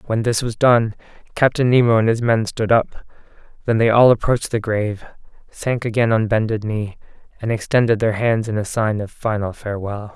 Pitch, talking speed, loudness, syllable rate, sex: 110 Hz, 190 wpm, -18 LUFS, 5.4 syllables/s, male